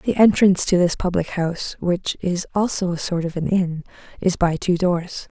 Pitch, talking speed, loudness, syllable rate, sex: 180 Hz, 200 wpm, -20 LUFS, 4.8 syllables/s, female